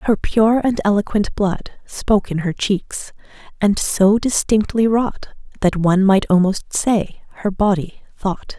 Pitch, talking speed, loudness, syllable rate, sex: 200 Hz, 145 wpm, -18 LUFS, 4.0 syllables/s, female